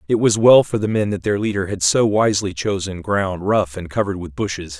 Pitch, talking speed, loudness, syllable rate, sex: 100 Hz, 240 wpm, -18 LUFS, 5.6 syllables/s, male